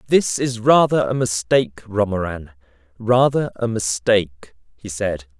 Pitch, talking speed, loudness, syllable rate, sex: 105 Hz, 110 wpm, -19 LUFS, 4.4 syllables/s, male